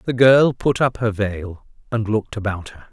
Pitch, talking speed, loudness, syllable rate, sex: 110 Hz, 205 wpm, -19 LUFS, 4.8 syllables/s, male